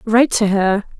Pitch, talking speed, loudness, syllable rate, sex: 215 Hz, 180 wpm, -16 LUFS, 4.9 syllables/s, female